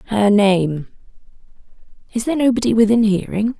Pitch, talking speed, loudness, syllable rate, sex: 215 Hz, 100 wpm, -16 LUFS, 5.5 syllables/s, female